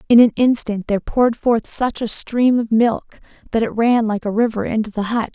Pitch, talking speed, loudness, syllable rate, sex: 225 Hz, 225 wpm, -17 LUFS, 5.2 syllables/s, female